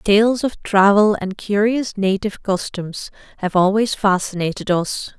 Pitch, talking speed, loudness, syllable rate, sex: 200 Hz, 125 wpm, -18 LUFS, 4.2 syllables/s, female